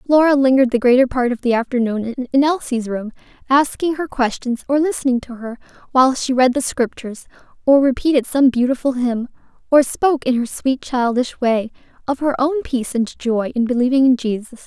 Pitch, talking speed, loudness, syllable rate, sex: 255 Hz, 185 wpm, -17 LUFS, 5.6 syllables/s, female